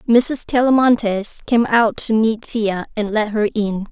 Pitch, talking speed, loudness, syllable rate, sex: 220 Hz, 170 wpm, -17 LUFS, 3.9 syllables/s, female